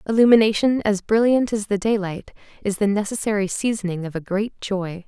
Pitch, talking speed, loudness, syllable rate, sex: 205 Hz, 165 wpm, -21 LUFS, 5.5 syllables/s, female